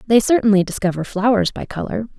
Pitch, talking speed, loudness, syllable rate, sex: 210 Hz, 165 wpm, -18 LUFS, 6.2 syllables/s, female